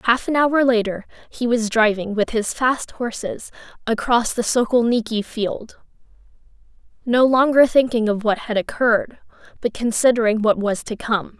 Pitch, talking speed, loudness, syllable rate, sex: 230 Hz, 145 wpm, -19 LUFS, 4.7 syllables/s, female